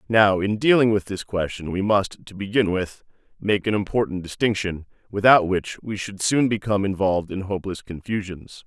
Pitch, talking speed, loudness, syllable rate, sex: 100 Hz, 175 wpm, -22 LUFS, 5.2 syllables/s, male